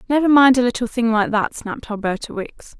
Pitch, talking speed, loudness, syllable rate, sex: 235 Hz, 215 wpm, -18 LUFS, 5.8 syllables/s, female